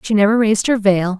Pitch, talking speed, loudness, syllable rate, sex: 210 Hz, 250 wpm, -15 LUFS, 6.4 syllables/s, female